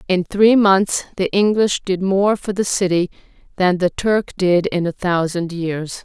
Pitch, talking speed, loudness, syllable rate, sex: 185 Hz, 180 wpm, -17 LUFS, 4.1 syllables/s, female